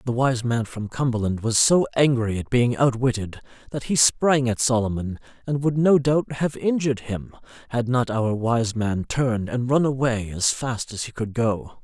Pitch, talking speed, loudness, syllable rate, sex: 120 Hz, 195 wpm, -22 LUFS, 4.7 syllables/s, male